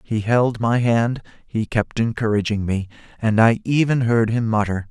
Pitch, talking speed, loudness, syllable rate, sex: 115 Hz, 170 wpm, -20 LUFS, 4.5 syllables/s, male